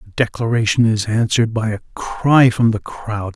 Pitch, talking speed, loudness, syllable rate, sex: 110 Hz, 180 wpm, -17 LUFS, 4.8 syllables/s, male